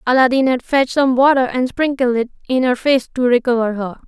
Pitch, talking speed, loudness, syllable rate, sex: 255 Hz, 205 wpm, -16 LUFS, 5.8 syllables/s, female